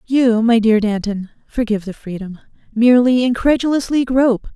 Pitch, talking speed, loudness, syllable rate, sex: 230 Hz, 130 wpm, -16 LUFS, 5.4 syllables/s, female